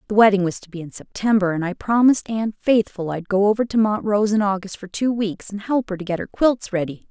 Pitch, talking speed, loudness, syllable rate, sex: 205 Hz, 255 wpm, -20 LUFS, 6.2 syllables/s, female